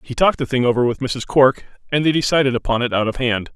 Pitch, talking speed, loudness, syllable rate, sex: 130 Hz, 270 wpm, -18 LUFS, 6.5 syllables/s, male